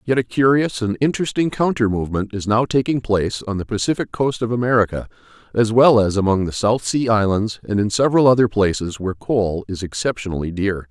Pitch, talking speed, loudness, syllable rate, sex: 110 Hz, 195 wpm, -19 LUFS, 5.9 syllables/s, male